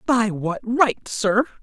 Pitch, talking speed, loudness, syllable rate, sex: 225 Hz, 150 wpm, -21 LUFS, 3.0 syllables/s, female